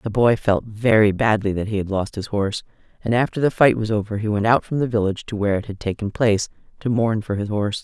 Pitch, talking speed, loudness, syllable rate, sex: 110 Hz, 260 wpm, -20 LUFS, 6.4 syllables/s, female